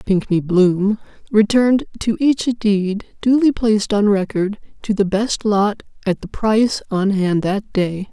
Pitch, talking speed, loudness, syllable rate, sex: 205 Hz, 165 wpm, -18 LUFS, 4.2 syllables/s, female